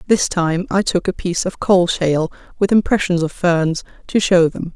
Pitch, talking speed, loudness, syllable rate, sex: 180 Hz, 200 wpm, -17 LUFS, 5.0 syllables/s, female